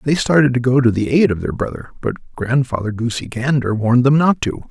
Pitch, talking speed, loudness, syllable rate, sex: 125 Hz, 230 wpm, -17 LUFS, 5.6 syllables/s, male